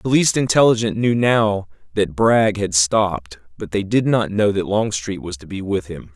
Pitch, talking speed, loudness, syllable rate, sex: 100 Hz, 205 wpm, -18 LUFS, 4.6 syllables/s, male